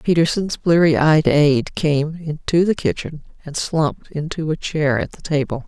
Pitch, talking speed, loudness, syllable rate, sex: 155 Hz, 170 wpm, -19 LUFS, 4.5 syllables/s, female